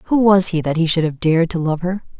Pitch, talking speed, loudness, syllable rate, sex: 170 Hz, 300 wpm, -17 LUFS, 5.9 syllables/s, female